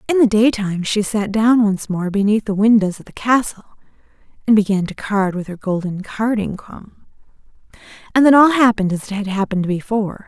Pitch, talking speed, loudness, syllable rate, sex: 210 Hz, 185 wpm, -17 LUFS, 5.6 syllables/s, female